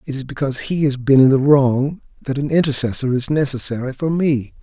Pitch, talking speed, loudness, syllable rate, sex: 135 Hz, 205 wpm, -17 LUFS, 5.6 syllables/s, male